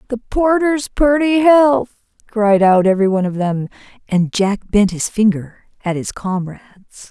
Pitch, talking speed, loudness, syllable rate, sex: 220 Hz, 150 wpm, -15 LUFS, 4.7 syllables/s, female